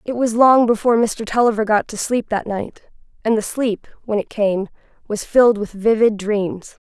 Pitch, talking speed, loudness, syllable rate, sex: 220 Hz, 190 wpm, -18 LUFS, 4.9 syllables/s, female